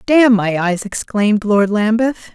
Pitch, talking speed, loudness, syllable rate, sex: 215 Hz, 155 wpm, -15 LUFS, 4.0 syllables/s, female